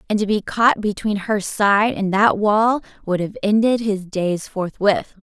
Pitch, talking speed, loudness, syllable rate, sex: 210 Hz, 185 wpm, -19 LUFS, 4.0 syllables/s, female